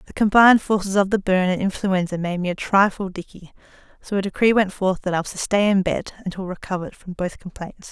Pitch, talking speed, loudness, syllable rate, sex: 190 Hz, 225 wpm, -20 LUFS, 6.0 syllables/s, female